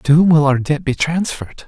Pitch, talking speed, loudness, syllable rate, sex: 150 Hz, 250 wpm, -15 LUFS, 5.5 syllables/s, male